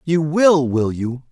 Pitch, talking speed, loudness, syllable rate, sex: 145 Hz, 185 wpm, -17 LUFS, 3.4 syllables/s, male